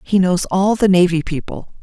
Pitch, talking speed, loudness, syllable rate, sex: 185 Hz, 195 wpm, -16 LUFS, 4.9 syllables/s, female